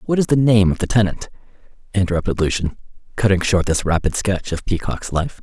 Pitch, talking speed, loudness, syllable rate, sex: 95 Hz, 190 wpm, -19 LUFS, 5.7 syllables/s, male